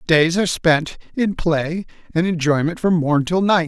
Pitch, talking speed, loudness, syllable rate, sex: 170 Hz, 180 wpm, -19 LUFS, 4.5 syllables/s, male